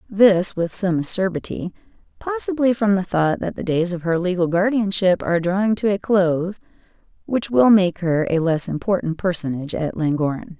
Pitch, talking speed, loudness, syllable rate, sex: 190 Hz, 165 wpm, -20 LUFS, 5.2 syllables/s, female